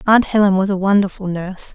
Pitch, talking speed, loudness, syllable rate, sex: 195 Hz, 205 wpm, -16 LUFS, 6.3 syllables/s, female